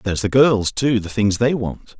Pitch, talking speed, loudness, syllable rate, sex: 110 Hz, 210 wpm, -18 LUFS, 4.8 syllables/s, male